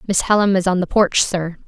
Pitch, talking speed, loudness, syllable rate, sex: 190 Hz, 250 wpm, -17 LUFS, 5.4 syllables/s, female